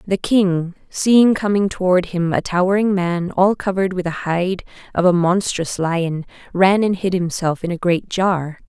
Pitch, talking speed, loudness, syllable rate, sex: 185 Hz, 180 wpm, -18 LUFS, 4.4 syllables/s, female